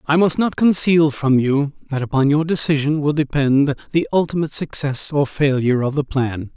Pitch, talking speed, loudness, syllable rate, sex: 145 Hz, 185 wpm, -18 LUFS, 5.2 syllables/s, male